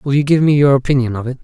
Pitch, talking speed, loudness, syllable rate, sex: 135 Hz, 335 wpm, -14 LUFS, 7.3 syllables/s, male